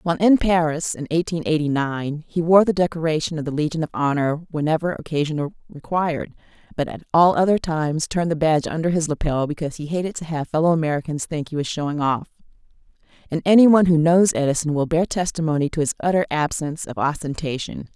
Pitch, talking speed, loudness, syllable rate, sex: 160 Hz, 190 wpm, -21 LUFS, 6.3 syllables/s, female